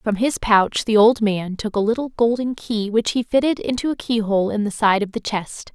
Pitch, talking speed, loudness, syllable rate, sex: 220 Hz, 250 wpm, -20 LUFS, 4.9 syllables/s, female